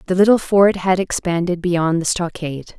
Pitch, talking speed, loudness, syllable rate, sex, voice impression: 180 Hz, 170 wpm, -17 LUFS, 5.0 syllables/s, female, feminine, adult-like, slightly refreshing, slightly calm, friendly, slightly reassuring